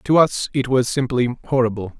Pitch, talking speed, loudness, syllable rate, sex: 125 Hz, 180 wpm, -19 LUFS, 5.3 syllables/s, male